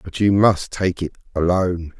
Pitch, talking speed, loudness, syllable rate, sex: 90 Hz, 180 wpm, -19 LUFS, 4.9 syllables/s, male